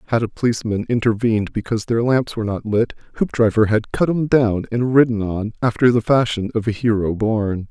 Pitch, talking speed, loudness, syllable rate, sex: 115 Hz, 195 wpm, -19 LUFS, 5.7 syllables/s, male